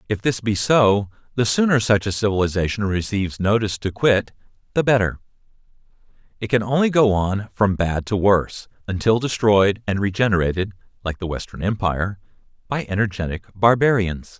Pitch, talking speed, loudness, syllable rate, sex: 105 Hz, 145 wpm, -20 LUFS, 5.1 syllables/s, male